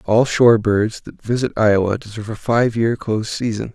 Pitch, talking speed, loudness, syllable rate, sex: 110 Hz, 190 wpm, -18 LUFS, 5.6 syllables/s, male